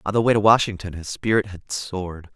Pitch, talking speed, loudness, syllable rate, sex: 100 Hz, 230 wpm, -21 LUFS, 5.8 syllables/s, male